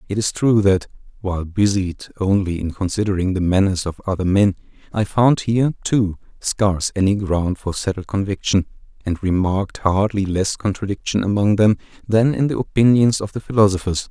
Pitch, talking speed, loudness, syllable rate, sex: 100 Hz, 160 wpm, -19 LUFS, 5.3 syllables/s, male